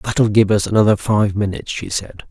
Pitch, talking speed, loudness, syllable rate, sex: 105 Hz, 210 wpm, -17 LUFS, 5.4 syllables/s, male